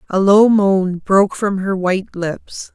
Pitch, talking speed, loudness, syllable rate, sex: 195 Hz, 175 wpm, -15 LUFS, 3.9 syllables/s, female